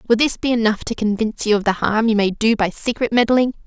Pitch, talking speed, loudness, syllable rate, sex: 225 Hz, 260 wpm, -18 LUFS, 6.3 syllables/s, female